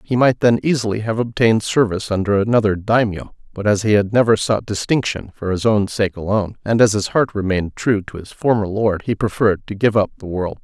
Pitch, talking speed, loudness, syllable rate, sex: 105 Hz, 220 wpm, -18 LUFS, 5.9 syllables/s, male